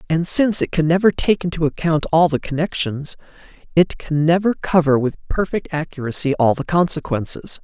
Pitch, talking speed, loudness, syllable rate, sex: 160 Hz, 165 wpm, -18 LUFS, 5.4 syllables/s, male